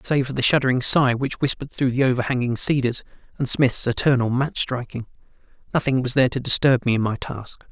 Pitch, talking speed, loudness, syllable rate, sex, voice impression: 125 Hz, 200 wpm, -21 LUFS, 6.0 syllables/s, male, masculine, adult-like, slightly fluent, slightly sincere, slightly kind